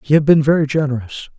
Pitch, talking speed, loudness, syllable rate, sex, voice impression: 145 Hz, 215 wpm, -15 LUFS, 7.6 syllables/s, male, very masculine, very adult-like, very old, thick, very relaxed, very weak, dark, very soft, slightly muffled, slightly fluent, raspy, intellectual, very sincere, very calm, very mature, very friendly, reassuring, very unique, slightly elegant, slightly wild, slightly sweet, very kind, very modest, slightly light